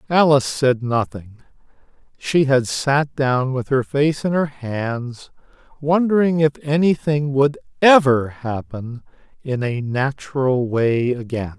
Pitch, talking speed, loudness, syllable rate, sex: 135 Hz, 125 wpm, -19 LUFS, 3.8 syllables/s, male